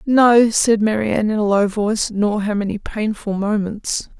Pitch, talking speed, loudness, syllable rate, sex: 210 Hz, 170 wpm, -18 LUFS, 4.5 syllables/s, female